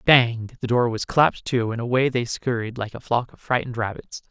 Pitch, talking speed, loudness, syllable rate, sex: 120 Hz, 225 wpm, -23 LUFS, 5.3 syllables/s, male